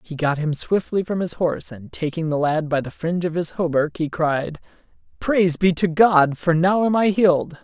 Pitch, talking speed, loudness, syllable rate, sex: 170 Hz, 220 wpm, -20 LUFS, 5.1 syllables/s, male